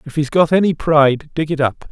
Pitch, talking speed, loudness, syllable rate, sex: 150 Hz, 250 wpm, -16 LUFS, 5.7 syllables/s, male